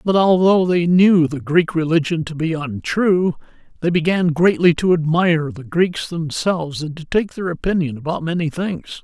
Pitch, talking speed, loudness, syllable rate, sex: 165 Hz, 175 wpm, -18 LUFS, 4.7 syllables/s, male